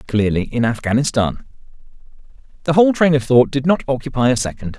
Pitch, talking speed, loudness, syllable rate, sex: 130 Hz, 165 wpm, -17 LUFS, 6.2 syllables/s, male